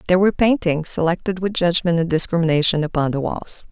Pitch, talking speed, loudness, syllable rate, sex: 170 Hz, 180 wpm, -18 LUFS, 6.3 syllables/s, female